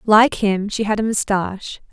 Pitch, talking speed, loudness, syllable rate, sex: 210 Hz, 190 wpm, -18 LUFS, 4.6 syllables/s, female